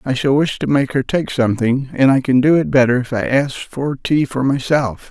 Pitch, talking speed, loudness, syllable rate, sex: 135 Hz, 245 wpm, -16 LUFS, 5.0 syllables/s, male